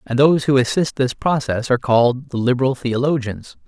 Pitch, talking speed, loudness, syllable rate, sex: 130 Hz, 180 wpm, -18 LUFS, 5.8 syllables/s, male